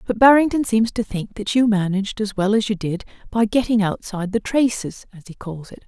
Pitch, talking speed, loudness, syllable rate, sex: 210 Hz, 225 wpm, -20 LUFS, 5.6 syllables/s, female